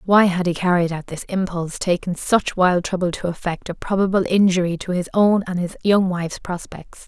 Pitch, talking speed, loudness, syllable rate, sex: 180 Hz, 195 wpm, -20 LUFS, 5.3 syllables/s, female